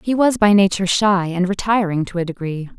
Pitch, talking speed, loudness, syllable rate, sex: 190 Hz, 215 wpm, -17 LUFS, 5.7 syllables/s, female